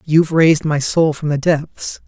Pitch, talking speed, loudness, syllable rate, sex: 155 Hz, 200 wpm, -15 LUFS, 4.6 syllables/s, male